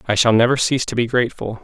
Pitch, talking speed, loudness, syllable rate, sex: 120 Hz, 255 wpm, -17 LUFS, 7.6 syllables/s, male